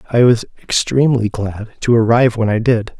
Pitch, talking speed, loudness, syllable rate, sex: 115 Hz, 180 wpm, -15 LUFS, 5.6 syllables/s, male